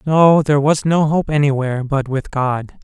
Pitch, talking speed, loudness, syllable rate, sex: 145 Hz, 190 wpm, -16 LUFS, 4.9 syllables/s, male